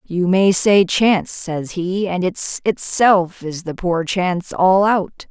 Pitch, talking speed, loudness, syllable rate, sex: 185 Hz, 170 wpm, -17 LUFS, 3.5 syllables/s, female